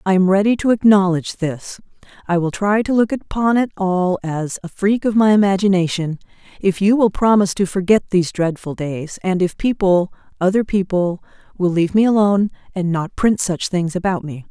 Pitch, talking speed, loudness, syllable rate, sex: 190 Hz, 185 wpm, -17 LUFS, 5.4 syllables/s, female